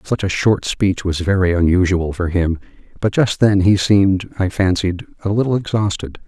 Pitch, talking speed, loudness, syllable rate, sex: 95 Hz, 180 wpm, -17 LUFS, 4.9 syllables/s, male